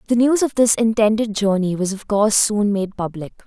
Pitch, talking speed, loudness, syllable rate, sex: 210 Hz, 210 wpm, -18 LUFS, 5.4 syllables/s, female